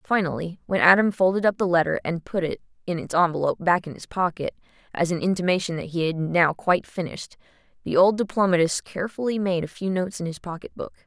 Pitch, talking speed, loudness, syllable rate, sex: 180 Hz, 205 wpm, -23 LUFS, 6.4 syllables/s, female